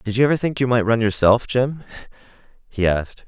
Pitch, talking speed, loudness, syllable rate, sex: 115 Hz, 200 wpm, -19 LUFS, 5.9 syllables/s, male